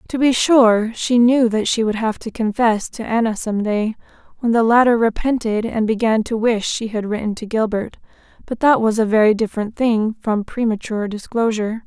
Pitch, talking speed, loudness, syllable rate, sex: 225 Hz, 190 wpm, -18 LUFS, 5.1 syllables/s, female